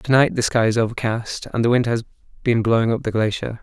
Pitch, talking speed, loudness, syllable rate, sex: 115 Hz, 230 wpm, -20 LUFS, 5.7 syllables/s, male